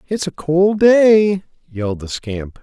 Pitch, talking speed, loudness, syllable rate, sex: 165 Hz, 160 wpm, -15 LUFS, 3.5 syllables/s, male